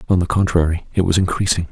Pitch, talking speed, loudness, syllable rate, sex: 90 Hz, 210 wpm, -18 LUFS, 6.8 syllables/s, male